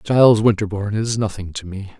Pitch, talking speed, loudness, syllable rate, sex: 105 Hz, 180 wpm, -18 LUFS, 6.0 syllables/s, male